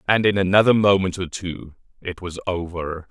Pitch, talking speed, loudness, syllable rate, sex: 90 Hz, 175 wpm, -20 LUFS, 4.9 syllables/s, male